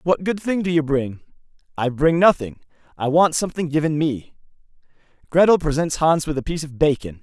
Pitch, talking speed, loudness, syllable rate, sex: 155 Hz, 185 wpm, -20 LUFS, 5.6 syllables/s, male